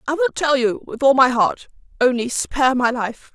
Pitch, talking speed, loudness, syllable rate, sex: 260 Hz, 215 wpm, -18 LUFS, 5.1 syllables/s, female